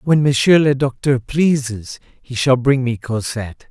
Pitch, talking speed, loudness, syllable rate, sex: 130 Hz, 160 wpm, -17 LUFS, 4.3 syllables/s, male